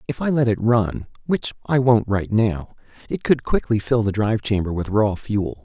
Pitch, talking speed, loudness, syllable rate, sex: 110 Hz, 190 wpm, -21 LUFS, 4.8 syllables/s, male